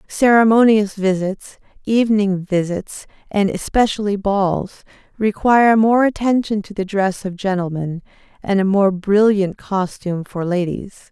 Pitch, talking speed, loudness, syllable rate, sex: 200 Hz, 120 wpm, -17 LUFS, 4.4 syllables/s, female